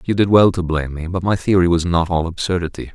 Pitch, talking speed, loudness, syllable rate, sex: 90 Hz, 265 wpm, -17 LUFS, 6.3 syllables/s, male